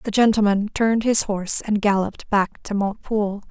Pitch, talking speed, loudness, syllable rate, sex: 210 Hz, 170 wpm, -21 LUFS, 5.7 syllables/s, female